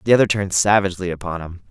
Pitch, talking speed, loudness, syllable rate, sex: 95 Hz, 210 wpm, -19 LUFS, 7.8 syllables/s, male